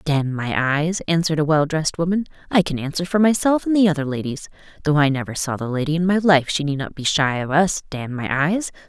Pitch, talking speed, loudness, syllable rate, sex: 155 Hz, 245 wpm, -20 LUFS, 6.0 syllables/s, female